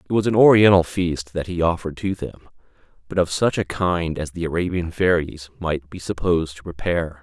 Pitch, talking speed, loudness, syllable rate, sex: 85 Hz, 200 wpm, -21 LUFS, 5.5 syllables/s, male